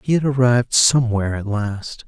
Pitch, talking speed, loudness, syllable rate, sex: 120 Hz, 175 wpm, -18 LUFS, 5.6 syllables/s, male